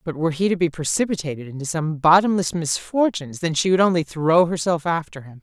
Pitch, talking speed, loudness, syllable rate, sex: 165 Hz, 200 wpm, -20 LUFS, 6.0 syllables/s, female